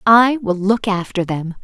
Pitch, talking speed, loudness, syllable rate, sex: 205 Hz, 185 wpm, -17 LUFS, 4.1 syllables/s, female